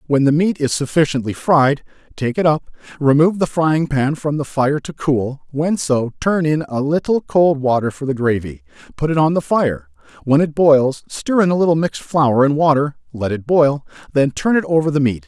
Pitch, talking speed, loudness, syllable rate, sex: 145 Hz, 210 wpm, -17 LUFS, 5.1 syllables/s, male